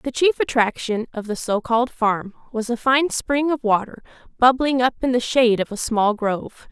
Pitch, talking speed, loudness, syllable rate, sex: 240 Hz, 195 wpm, -20 LUFS, 5.0 syllables/s, female